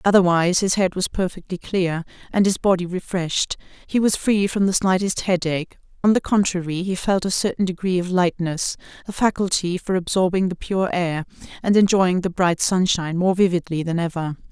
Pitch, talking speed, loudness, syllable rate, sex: 180 Hz, 180 wpm, -21 LUFS, 5.4 syllables/s, female